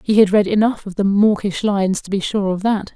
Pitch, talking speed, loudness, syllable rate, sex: 200 Hz, 265 wpm, -17 LUFS, 5.6 syllables/s, female